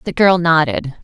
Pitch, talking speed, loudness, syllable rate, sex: 155 Hz, 175 wpm, -14 LUFS, 4.4 syllables/s, female